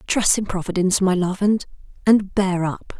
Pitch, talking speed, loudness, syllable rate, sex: 190 Hz, 160 wpm, -20 LUFS, 4.9 syllables/s, female